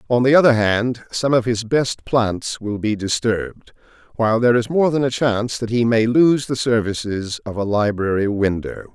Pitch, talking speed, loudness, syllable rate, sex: 115 Hz, 195 wpm, -18 LUFS, 4.9 syllables/s, male